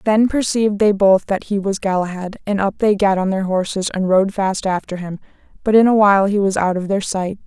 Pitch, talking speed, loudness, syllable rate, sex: 195 Hz, 240 wpm, -17 LUFS, 5.5 syllables/s, female